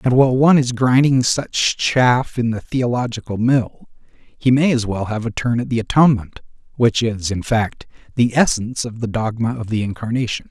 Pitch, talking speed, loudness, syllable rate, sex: 120 Hz, 190 wpm, -18 LUFS, 5.0 syllables/s, male